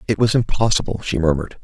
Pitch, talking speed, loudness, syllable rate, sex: 100 Hz, 185 wpm, -19 LUFS, 7.0 syllables/s, male